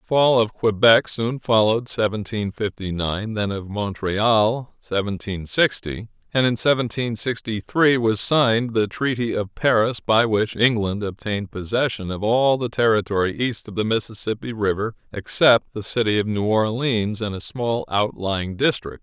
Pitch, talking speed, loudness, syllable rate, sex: 110 Hz, 160 wpm, -21 LUFS, 4.3 syllables/s, male